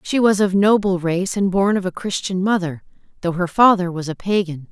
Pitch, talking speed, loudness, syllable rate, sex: 190 Hz, 215 wpm, -18 LUFS, 5.2 syllables/s, female